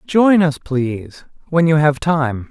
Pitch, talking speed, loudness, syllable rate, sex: 155 Hz, 170 wpm, -16 LUFS, 3.9 syllables/s, male